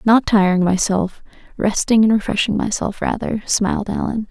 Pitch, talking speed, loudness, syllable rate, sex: 210 Hz, 125 wpm, -18 LUFS, 5.0 syllables/s, female